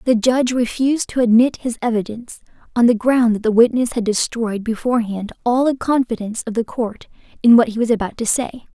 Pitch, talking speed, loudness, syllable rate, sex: 235 Hz, 200 wpm, -18 LUFS, 5.9 syllables/s, female